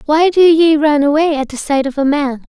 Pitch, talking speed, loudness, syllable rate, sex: 295 Hz, 265 wpm, -13 LUFS, 5.2 syllables/s, female